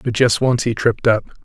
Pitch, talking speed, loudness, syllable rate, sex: 120 Hz, 250 wpm, -17 LUFS, 6.0 syllables/s, male